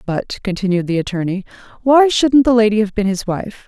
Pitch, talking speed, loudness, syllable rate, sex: 210 Hz, 195 wpm, -16 LUFS, 5.5 syllables/s, female